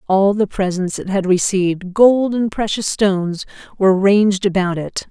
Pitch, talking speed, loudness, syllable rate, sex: 195 Hz, 165 wpm, -16 LUFS, 4.8 syllables/s, female